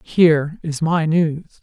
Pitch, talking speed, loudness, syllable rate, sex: 160 Hz, 145 wpm, -18 LUFS, 3.7 syllables/s, female